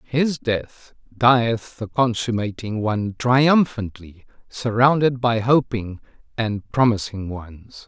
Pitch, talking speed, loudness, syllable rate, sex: 115 Hz, 100 wpm, -20 LUFS, 3.5 syllables/s, male